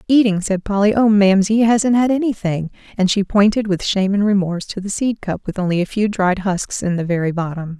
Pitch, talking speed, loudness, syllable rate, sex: 200 Hz, 230 wpm, -17 LUFS, 5.7 syllables/s, female